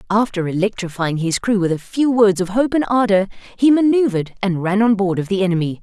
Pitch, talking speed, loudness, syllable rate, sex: 200 Hz, 215 wpm, -17 LUFS, 5.6 syllables/s, female